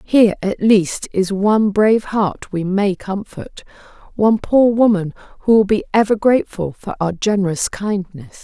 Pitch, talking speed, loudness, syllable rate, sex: 200 Hz, 155 wpm, -17 LUFS, 4.7 syllables/s, female